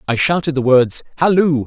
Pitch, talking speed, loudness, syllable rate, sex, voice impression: 145 Hz, 180 wpm, -15 LUFS, 5.2 syllables/s, male, masculine, middle-aged, thick, tensed, powerful, hard, slightly raspy, intellectual, calm, mature, wild, lively, strict